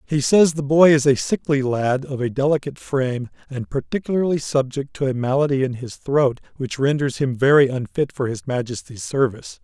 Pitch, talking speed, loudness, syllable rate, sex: 135 Hz, 185 wpm, -20 LUFS, 5.4 syllables/s, male